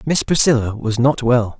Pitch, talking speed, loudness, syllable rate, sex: 125 Hz, 190 wpm, -16 LUFS, 4.8 syllables/s, male